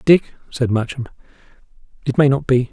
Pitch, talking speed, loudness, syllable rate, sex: 130 Hz, 155 wpm, -18 LUFS, 5.8 syllables/s, male